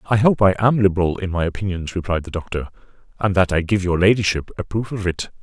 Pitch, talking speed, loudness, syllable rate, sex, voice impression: 95 Hz, 230 wpm, -20 LUFS, 6.3 syllables/s, male, very masculine, adult-like, slightly thick, cool, slightly wild